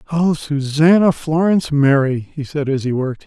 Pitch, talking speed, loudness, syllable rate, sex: 150 Hz, 165 wpm, -16 LUFS, 5.0 syllables/s, male